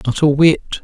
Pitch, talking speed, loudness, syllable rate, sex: 150 Hz, 215 wpm, -14 LUFS, 5.7 syllables/s, male